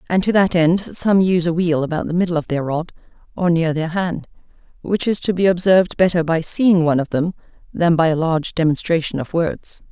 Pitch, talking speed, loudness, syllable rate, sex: 170 Hz, 220 wpm, -18 LUFS, 5.7 syllables/s, female